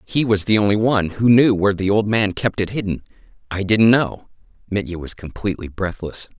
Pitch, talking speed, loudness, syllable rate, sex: 100 Hz, 195 wpm, -19 LUFS, 5.6 syllables/s, male